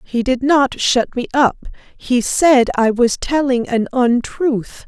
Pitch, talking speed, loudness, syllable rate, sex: 255 Hz, 160 wpm, -16 LUFS, 3.5 syllables/s, female